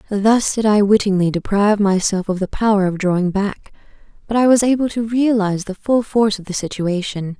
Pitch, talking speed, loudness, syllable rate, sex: 205 Hz, 195 wpm, -17 LUFS, 5.6 syllables/s, female